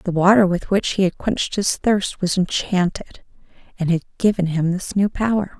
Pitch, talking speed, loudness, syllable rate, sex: 190 Hz, 195 wpm, -19 LUFS, 5.1 syllables/s, female